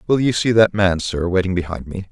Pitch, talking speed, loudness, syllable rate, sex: 100 Hz, 255 wpm, -18 LUFS, 5.7 syllables/s, male